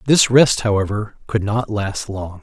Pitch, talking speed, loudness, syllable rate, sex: 105 Hz, 175 wpm, -18 LUFS, 4.2 syllables/s, male